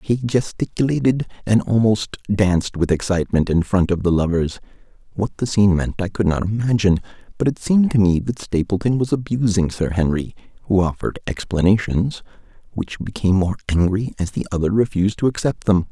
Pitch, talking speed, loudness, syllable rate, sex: 100 Hz, 170 wpm, -19 LUFS, 5.8 syllables/s, male